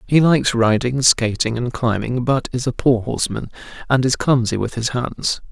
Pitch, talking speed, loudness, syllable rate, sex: 125 Hz, 185 wpm, -18 LUFS, 4.9 syllables/s, male